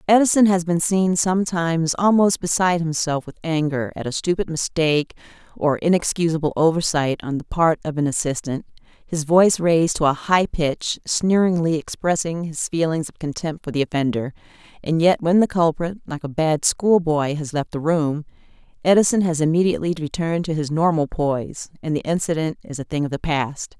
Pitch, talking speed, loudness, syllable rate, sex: 165 Hz, 175 wpm, -20 LUFS, 5.4 syllables/s, female